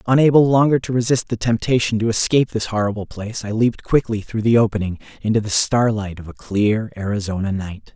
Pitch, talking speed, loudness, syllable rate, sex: 110 Hz, 190 wpm, -19 LUFS, 6.0 syllables/s, male